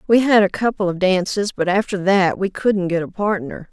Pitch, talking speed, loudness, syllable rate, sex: 195 Hz, 225 wpm, -18 LUFS, 5.1 syllables/s, female